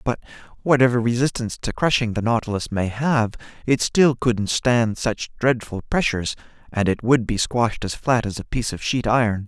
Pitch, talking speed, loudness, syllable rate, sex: 115 Hz, 185 wpm, -21 LUFS, 5.3 syllables/s, male